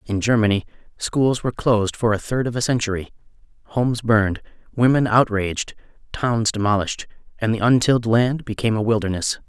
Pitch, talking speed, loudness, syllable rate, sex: 115 Hz, 150 wpm, -20 LUFS, 6.0 syllables/s, male